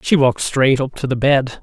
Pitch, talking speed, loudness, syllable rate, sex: 135 Hz, 260 wpm, -16 LUFS, 5.2 syllables/s, male